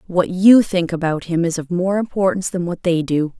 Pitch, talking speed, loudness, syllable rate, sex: 180 Hz, 230 wpm, -17 LUFS, 5.3 syllables/s, female